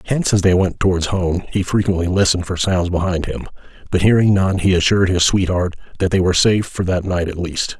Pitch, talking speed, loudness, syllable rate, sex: 90 Hz, 225 wpm, -17 LUFS, 6.1 syllables/s, male